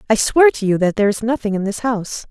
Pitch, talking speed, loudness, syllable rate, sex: 220 Hz, 285 wpm, -17 LUFS, 6.7 syllables/s, female